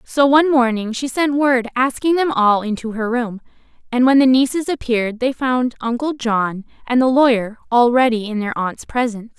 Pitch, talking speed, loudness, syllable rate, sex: 245 Hz, 185 wpm, -17 LUFS, 5.1 syllables/s, female